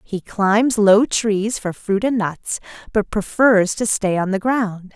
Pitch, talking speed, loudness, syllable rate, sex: 210 Hz, 180 wpm, -18 LUFS, 3.5 syllables/s, female